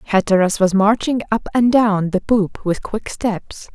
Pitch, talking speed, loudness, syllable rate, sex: 205 Hz, 175 wpm, -17 LUFS, 4.1 syllables/s, female